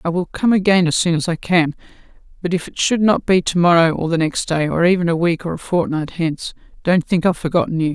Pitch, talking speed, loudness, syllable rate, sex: 170 Hz, 255 wpm, -17 LUFS, 6.1 syllables/s, female